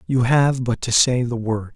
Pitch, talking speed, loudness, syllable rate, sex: 120 Hz, 240 wpm, -19 LUFS, 4.3 syllables/s, male